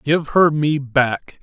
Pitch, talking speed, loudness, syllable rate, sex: 145 Hz, 170 wpm, -17 LUFS, 3.0 syllables/s, male